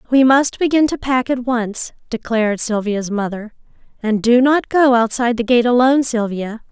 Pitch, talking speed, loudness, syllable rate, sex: 240 Hz, 170 wpm, -16 LUFS, 5.0 syllables/s, female